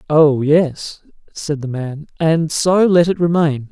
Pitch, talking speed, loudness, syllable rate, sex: 155 Hz, 160 wpm, -15 LUFS, 3.5 syllables/s, male